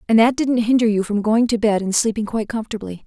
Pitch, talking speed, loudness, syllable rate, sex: 220 Hz, 255 wpm, -19 LUFS, 6.5 syllables/s, female